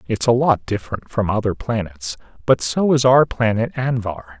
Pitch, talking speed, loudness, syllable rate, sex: 115 Hz, 175 wpm, -19 LUFS, 5.0 syllables/s, male